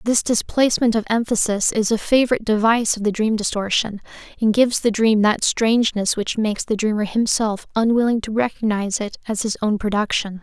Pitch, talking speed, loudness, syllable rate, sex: 220 Hz, 180 wpm, -19 LUFS, 5.8 syllables/s, female